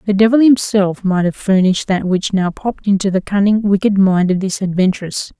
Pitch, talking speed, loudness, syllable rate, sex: 195 Hz, 200 wpm, -15 LUFS, 5.5 syllables/s, female